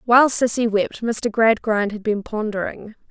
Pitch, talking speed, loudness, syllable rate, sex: 220 Hz, 155 wpm, -20 LUFS, 4.6 syllables/s, female